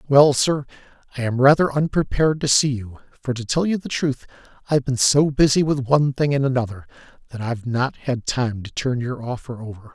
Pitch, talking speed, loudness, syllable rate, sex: 130 Hz, 205 wpm, -20 LUFS, 5.6 syllables/s, male